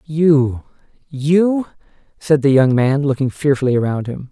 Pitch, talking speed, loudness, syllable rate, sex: 140 Hz, 125 wpm, -16 LUFS, 4.3 syllables/s, male